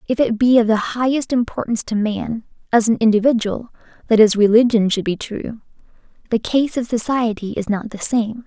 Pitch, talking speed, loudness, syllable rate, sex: 225 Hz, 185 wpm, -18 LUFS, 5.3 syllables/s, female